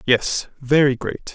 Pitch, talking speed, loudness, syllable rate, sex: 135 Hz, 135 wpm, -20 LUFS, 3.5 syllables/s, male